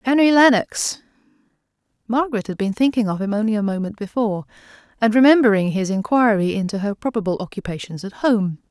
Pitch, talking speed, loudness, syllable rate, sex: 215 Hz, 150 wpm, -19 LUFS, 6.1 syllables/s, female